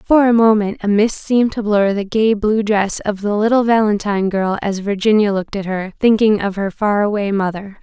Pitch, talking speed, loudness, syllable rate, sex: 210 Hz, 215 wpm, -16 LUFS, 5.2 syllables/s, female